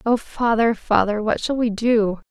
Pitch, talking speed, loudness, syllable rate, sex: 225 Hz, 180 wpm, -20 LUFS, 4.3 syllables/s, female